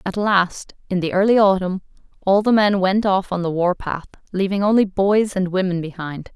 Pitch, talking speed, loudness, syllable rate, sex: 190 Hz, 200 wpm, -19 LUFS, 5.0 syllables/s, female